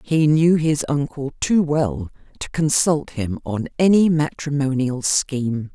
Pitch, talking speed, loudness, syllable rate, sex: 145 Hz, 135 wpm, -20 LUFS, 3.9 syllables/s, female